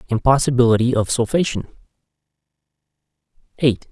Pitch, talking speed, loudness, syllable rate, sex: 115 Hz, 60 wpm, -18 LUFS, 6.1 syllables/s, male